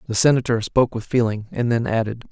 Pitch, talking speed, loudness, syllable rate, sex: 115 Hz, 205 wpm, -20 LUFS, 6.3 syllables/s, male